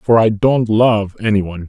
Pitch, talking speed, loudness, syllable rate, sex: 110 Hz, 215 wpm, -15 LUFS, 5.1 syllables/s, male